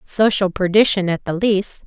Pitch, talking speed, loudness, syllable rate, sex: 195 Hz, 160 wpm, -17 LUFS, 4.6 syllables/s, female